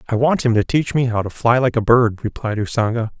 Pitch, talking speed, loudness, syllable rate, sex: 120 Hz, 265 wpm, -18 LUFS, 5.7 syllables/s, male